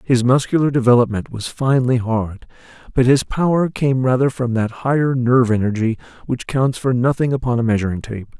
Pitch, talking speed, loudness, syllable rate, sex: 125 Hz, 170 wpm, -18 LUFS, 5.5 syllables/s, male